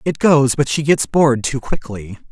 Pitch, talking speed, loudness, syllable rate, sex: 135 Hz, 205 wpm, -16 LUFS, 4.7 syllables/s, male